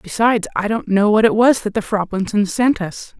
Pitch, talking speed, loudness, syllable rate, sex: 210 Hz, 225 wpm, -17 LUFS, 5.2 syllables/s, female